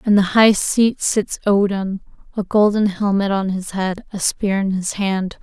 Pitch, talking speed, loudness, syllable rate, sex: 200 Hz, 190 wpm, -18 LUFS, 4.1 syllables/s, female